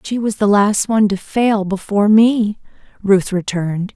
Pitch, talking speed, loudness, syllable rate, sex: 205 Hz, 165 wpm, -15 LUFS, 4.7 syllables/s, female